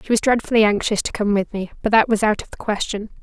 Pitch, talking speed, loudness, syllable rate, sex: 215 Hz, 280 wpm, -19 LUFS, 6.6 syllables/s, female